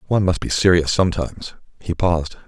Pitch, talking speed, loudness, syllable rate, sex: 85 Hz, 170 wpm, -19 LUFS, 6.6 syllables/s, male